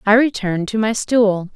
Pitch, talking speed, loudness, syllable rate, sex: 215 Hz, 195 wpm, -17 LUFS, 5.0 syllables/s, female